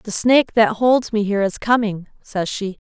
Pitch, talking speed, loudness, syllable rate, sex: 215 Hz, 210 wpm, -18 LUFS, 4.9 syllables/s, female